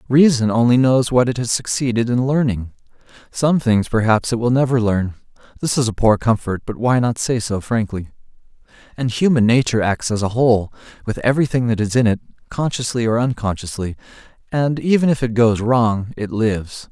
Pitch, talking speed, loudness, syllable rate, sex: 120 Hz, 180 wpm, -18 LUFS, 5.5 syllables/s, male